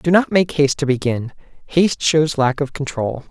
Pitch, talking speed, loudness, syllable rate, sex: 145 Hz, 180 wpm, -18 LUFS, 5.1 syllables/s, male